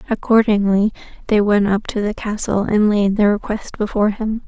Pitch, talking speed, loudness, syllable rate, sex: 210 Hz, 175 wpm, -17 LUFS, 5.2 syllables/s, female